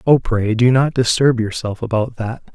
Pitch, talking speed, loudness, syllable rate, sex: 120 Hz, 190 wpm, -17 LUFS, 4.5 syllables/s, male